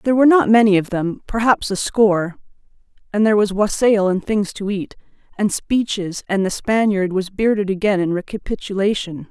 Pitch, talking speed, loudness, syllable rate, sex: 205 Hz, 160 wpm, -18 LUFS, 5.4 syllables/s, female